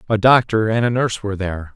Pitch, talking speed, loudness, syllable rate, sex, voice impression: 105 Hz, 240 wpm, -17 LUFS, 7.0 syllables/s, male, masculine, adult-like, slightly weak, slightly dark, slightly soft, fluent, cool, calm, slightly friendly, wild, kind, modest